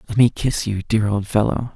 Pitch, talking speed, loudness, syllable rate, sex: 110 Hz, 240 wpm, -20 LUFS, 5.1 syllables/s, male